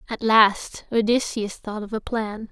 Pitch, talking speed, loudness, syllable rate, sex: 220 Hz, 165 wpm, -22 LUFS, 4.0 syllables/s, female